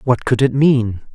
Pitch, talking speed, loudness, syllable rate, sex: 125 Hz, 210 wpm, -16 LUFS, 4.2 syllables/s, male